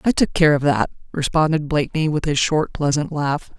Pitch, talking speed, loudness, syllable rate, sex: 150 Hz, 200 wpm, -19 LUFS, 5.2 syllables/s, female